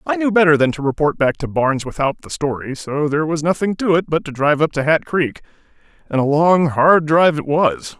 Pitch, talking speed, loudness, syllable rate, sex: 155 Hz, 240 wpm, -17 LUFS, 5.8 syllables/s, male